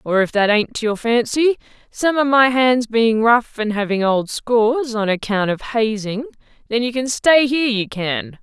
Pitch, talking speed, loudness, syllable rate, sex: 230 Hz, 200 wpm, -17 LUFS, 4.5 syllables/s, female